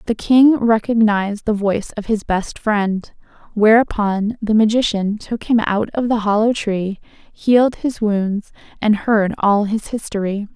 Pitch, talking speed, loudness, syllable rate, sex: 215 Hz, 155 wpm, -17 LUFS, 4.2 syllables/s, female